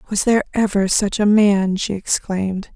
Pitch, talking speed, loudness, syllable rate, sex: 200 Hz, 175 wpm, -18 LUFS, 4.9 syllables/s, female